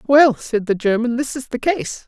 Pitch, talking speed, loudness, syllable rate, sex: 250 Hz, 230 wpm, -18 LUFS, 4.6 syllables/s, female